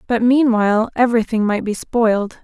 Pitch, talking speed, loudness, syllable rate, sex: 225 Hz, 150 wpm, -16 LUFS, 5.4 syllables/s, female